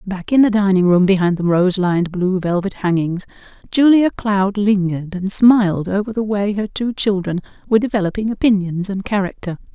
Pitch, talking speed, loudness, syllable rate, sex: 195 Hz, 170 wpm, -17 LUFS, 5.3 syllables/s, female